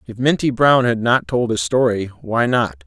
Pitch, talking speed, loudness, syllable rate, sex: 120 Hz, 210 wpm, -17 LUFS, 4.4 syllables/s, male